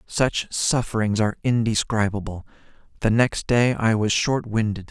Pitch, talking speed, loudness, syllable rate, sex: 110 Hz, 135 wpm, -22 LUFS, 4.6 syllables/s, male